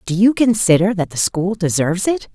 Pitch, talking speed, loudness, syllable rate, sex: 190 Hz, 205 wpm, -16 LUFS, 5.4 syllables/s, female